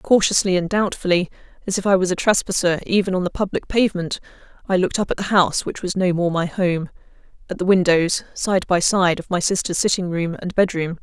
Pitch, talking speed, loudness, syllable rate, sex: 185 Hz, 210 wpm, -20 LUFS, 5.8 syllables/s, female